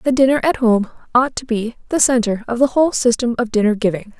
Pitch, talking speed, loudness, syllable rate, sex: 240 Hz, 230 wpm, -17 LUFS, 5.9 syllables/s, female